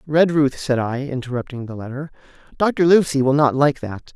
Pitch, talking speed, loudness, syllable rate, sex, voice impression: 140 Hz, 175 wpm, -19 LUFS, 5.3 syllables/s, male, masculine, slightly young, slightly adult-like, slightly tensed, slightly weak, slightly bright, hard, clear, slightly fluent, slightly cool, slightly intellectual, slightly refreshing, sincere, slightly calm, slightly friendly, slightly reassuring, unique, slightly wild, kind, very modest